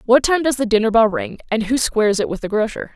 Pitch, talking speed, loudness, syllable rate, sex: 225 Hz, 285 wpm, -18 LUFS, 6.3 syllables/s, female